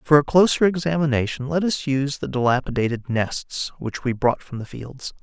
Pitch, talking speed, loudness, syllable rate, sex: 140 Hz, 185 wpm, -22 LUFS, 5.2 syllables/s, male